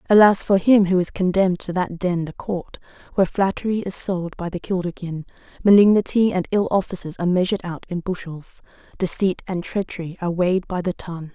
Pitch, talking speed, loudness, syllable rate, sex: 185 Hz, 185 wpm, -21 LUFS, 5.8 syllables/s, female